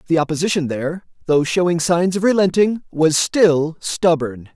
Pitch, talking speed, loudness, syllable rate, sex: 165 Hz, 145 wpm, -17 LUFS, 4.7 syllables/s, male